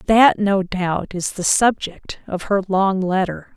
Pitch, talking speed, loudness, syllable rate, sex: 190 Hz, 170 wpm, -19 LUFS, 3.6 syllables/s, female